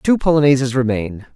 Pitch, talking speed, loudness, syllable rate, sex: 135 Hz, 135 wpm, -16 LUFS, 5.6 syllables/s, male